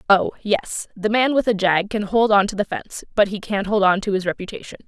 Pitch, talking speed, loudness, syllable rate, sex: 205 Hz, 260 wpm, -20 LUFS, 5.7 syllables/s, female